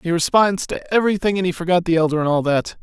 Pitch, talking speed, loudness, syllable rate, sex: 175 Hz, 255 wpm, -18 LUFS, 6.5 syllables/s, male